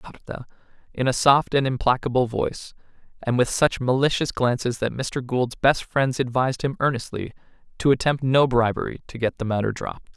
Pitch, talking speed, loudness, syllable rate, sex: 125 Hz, 170 wpm, -22 LUFS, 5.7 syllables/s, male